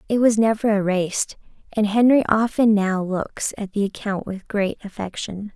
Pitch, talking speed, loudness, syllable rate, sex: 205 Hz, 160 wpm, -21 LUFS, 4.7 syllables/s, female